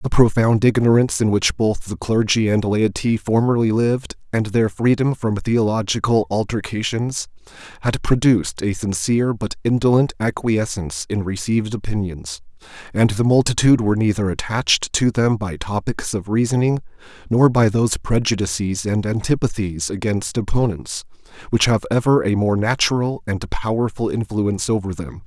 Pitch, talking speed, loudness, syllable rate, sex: 110 Hz, 140 wpm, -19 LUFS, 5.1 syllables/s, male